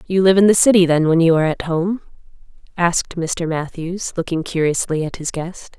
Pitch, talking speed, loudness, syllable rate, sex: 170 Hz, 195 wpm, -17 LUFS, 5.3 syllables/s, female